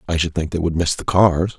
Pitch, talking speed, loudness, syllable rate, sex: 85 Hz, 305 wpm, -18 LUFS, 5.6 syllables/s, male